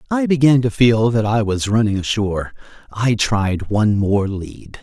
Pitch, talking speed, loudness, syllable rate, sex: 110 Hz, 175 wpm, -17 LUFS, 4.6 syllables/s, male